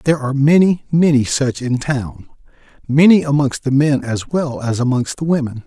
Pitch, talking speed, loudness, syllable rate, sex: 140 Hz, 180 wpm, -16 LUFS, 5.1 syllables/s, male